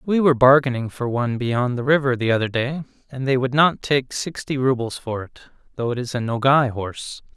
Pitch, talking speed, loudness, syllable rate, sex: 130 Hz, 210 wpm, -20 LUFS, 5.6 syllables/s, male